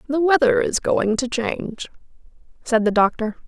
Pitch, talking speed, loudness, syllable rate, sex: 245 Hz, 155 wpm, -20 LUFS, 4.8 syllables/s, female